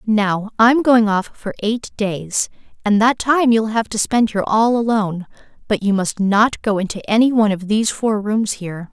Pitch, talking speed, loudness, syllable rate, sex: 215 Hz, 200 wpm, -17 LUFS, 4.8 syllables/s, female